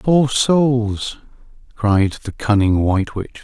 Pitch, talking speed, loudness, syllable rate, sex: 115 Hz, 120 wpm, -17 LUFS, 3.4 syllables/s, male